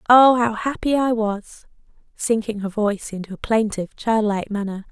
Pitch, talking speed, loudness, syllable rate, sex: 220 Hz, 160 wpm, -21 LUFS, 5.1 syllables/s, female